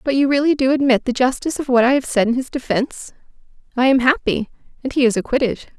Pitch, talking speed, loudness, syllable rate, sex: 260 Hz, 205 wpm, -18 LUFS, 6.7 syllables/s, female